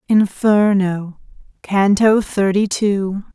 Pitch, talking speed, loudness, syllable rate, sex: 200 Hz, 70 wpm, -16 LUFS, 3.0 syllables/s, female